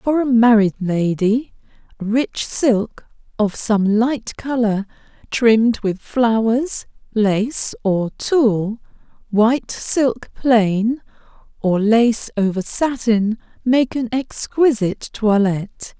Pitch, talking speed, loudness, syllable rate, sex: 225 Hz, 100 wpm, -18 LUFS, 3.2 syllables/s, female